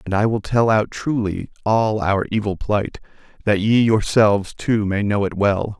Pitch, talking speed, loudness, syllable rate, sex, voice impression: 105 Hz, 185 wpm, -19 LUFS, 4.4 syllables/s, male, masculine, adult-like, thick, tensed, powerful, soft, cool, calm, mature, friendly, reassuring, wild, lively, slightly kind